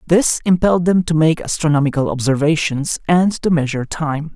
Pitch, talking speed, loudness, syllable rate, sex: 160 Hz, 150 wpm, -16 LUFS, 5.4 syllables/s, male